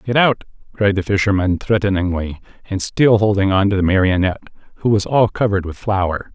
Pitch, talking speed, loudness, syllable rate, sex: 100 Hz, 170 wpm, -17 LUFS, 5.7 syllables/s, male